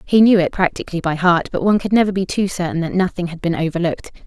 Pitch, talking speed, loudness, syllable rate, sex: 180 Hz, 255 wpm, -18 LUFS, 7.0 syllables/s, female